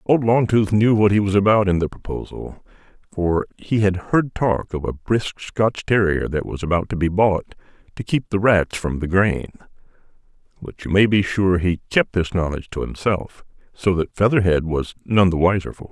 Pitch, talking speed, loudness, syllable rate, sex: 95 Hz, 200 wpm, -20 LUFS, 5.0 syllables/s, male